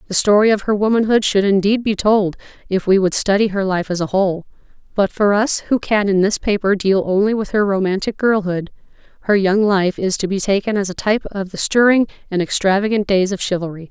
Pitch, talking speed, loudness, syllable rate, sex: 200 Hz, 215 wpm, -17 LUFS, 5.7 syllables/s, female